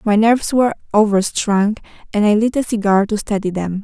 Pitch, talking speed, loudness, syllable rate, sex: 210 Hz, 190 wpm, -16 LUFS, 5.6 syllables/s, female